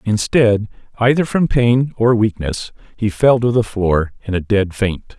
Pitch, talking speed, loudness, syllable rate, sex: 110 Hz, 175 wpm, -16 LUFS, 4.1 syllables/s, male